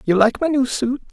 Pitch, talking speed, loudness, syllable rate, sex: 220 Hz, 270 wpm, -18 LUFS, 5.3 syllables/s, male